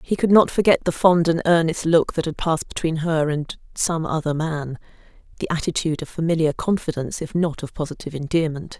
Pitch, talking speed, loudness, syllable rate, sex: 160 Hz, 185 wpm, -21 LUFS, 5.9 syllables/s, female